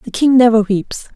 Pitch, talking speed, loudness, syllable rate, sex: 230 Hz, 205 wpm, -13 LUFS, 4.7 syllables/s, female